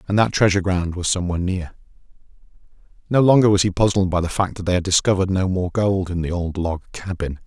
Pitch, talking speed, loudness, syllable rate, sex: 95 Hz, 215 wpm, -20 LUFS, 6.5 syllables/s, male